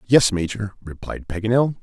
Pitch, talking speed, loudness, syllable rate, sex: 105 Hz, 130 wpm, -22 LUFS, 5.3 syllables/s, male